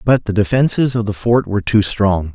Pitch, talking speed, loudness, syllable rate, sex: 105 Hz, 230 wpm, -16 LUFS, 5.3 syllables/s, male